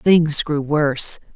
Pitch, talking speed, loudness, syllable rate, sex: 150 Hz, 135 wpm, -18 LUFS, 3.4 syllables/s, female